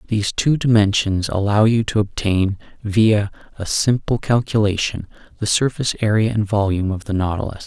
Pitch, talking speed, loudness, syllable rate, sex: 105 Hz, 150 wpm, -18 LUFS, 5.3 syllables/s, male